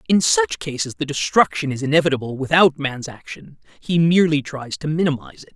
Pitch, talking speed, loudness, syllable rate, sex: 150 Hz, 175 wpm, -19 LUFS, 5.9 syllables/s, male